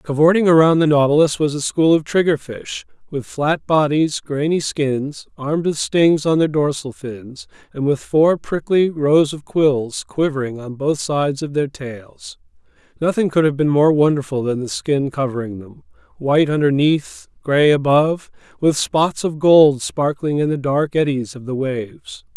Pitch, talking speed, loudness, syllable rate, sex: 145 Hz, 165 wpm, -17 LUFS, 4.5 syllables/s, male